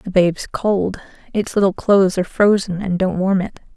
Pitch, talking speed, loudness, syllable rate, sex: 190 Hz, 190 wpm, -18 LUFS, 5.3 syllables/s, female